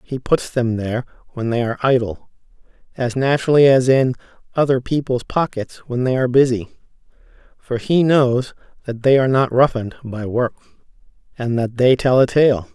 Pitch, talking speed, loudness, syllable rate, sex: 125 Hz, 165 wpm, -18 LUFS, 5.3 syllables/s, male